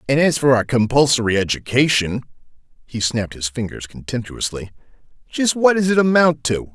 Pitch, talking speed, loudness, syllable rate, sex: 130 Hz, 135 wpm, -18 LUFS, 5.5 syllables/s, male